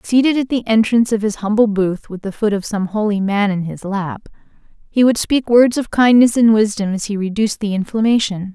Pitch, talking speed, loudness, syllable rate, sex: 215 Hz, 220 wpm, -16 LUFS, 5.5 syllables/s, female